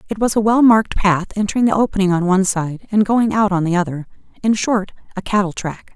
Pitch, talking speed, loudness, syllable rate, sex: 200 Hz, 230 wpm, -17 LUFS, 6.1 syllables/s, female